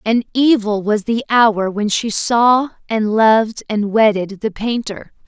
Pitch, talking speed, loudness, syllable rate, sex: 220 Hz, 160 wpm, -16 LUFS, 3.8 syllables/s, female